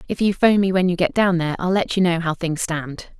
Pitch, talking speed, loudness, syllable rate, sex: 175 Hz, 300 wpm, -19 LUFS, 6.1 syllables/s, female